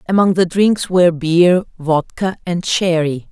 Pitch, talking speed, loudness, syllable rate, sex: 175 Hz, 145 wpm, -15 LUFS, 4.1 syllables/s, female